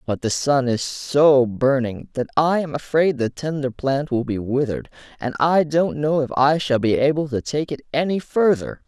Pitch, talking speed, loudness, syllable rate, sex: 140 Hz, 205 wpm, -20 LUFS, 4.7 syllables/s, male